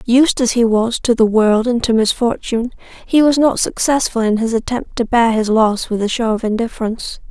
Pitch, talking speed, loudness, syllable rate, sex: 235 Hz, 215 wpm, -15 LUFS, 5.3 syllables/s, female